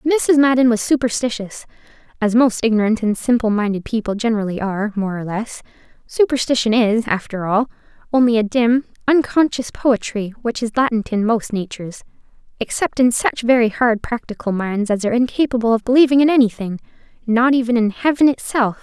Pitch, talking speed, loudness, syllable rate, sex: 230 Hz, 155 wpm, -17 LUFS, 5.6 syllables/s, female